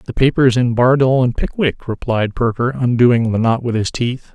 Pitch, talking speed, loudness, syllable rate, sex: 120 Hz, 195 wpm, -16 LUFS, 4.8 syllables/s, male